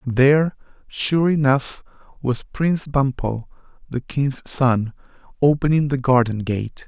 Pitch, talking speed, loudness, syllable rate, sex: 135 Hz, 120 wpm, -20 LUFS, 4.1 syllables/s, male